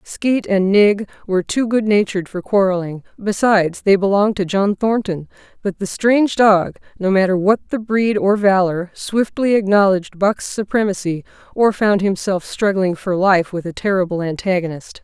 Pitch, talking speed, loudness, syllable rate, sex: 195 Hz, 150 wpm, -17 LUFS, 4.9 syllables/s, female